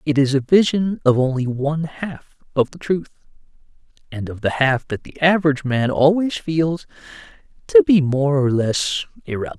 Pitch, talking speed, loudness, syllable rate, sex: 145 Hz, 170 wpm, -19 LUFS, 5.1 syllables/s, male